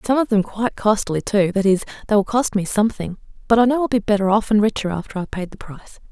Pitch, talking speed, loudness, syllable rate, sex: 210 Hz, 265 wpm, -19 LUFS, 7.0 syllables/s, female